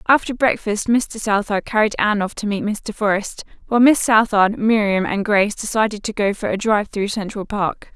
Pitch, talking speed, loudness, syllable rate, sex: 210 Hz, 195 wpm, -18 LUFS, 5.3 syllables/s, female